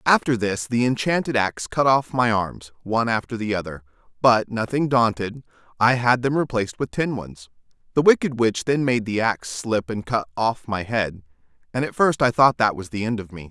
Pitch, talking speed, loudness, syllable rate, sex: 115 Hz, 210 wpm, -22 LUFS, 5.2 syllables/s, male